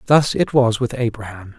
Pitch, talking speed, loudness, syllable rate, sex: 120 Hz, 190 wpm, -18 LUFS, 5.0 syllables/s, male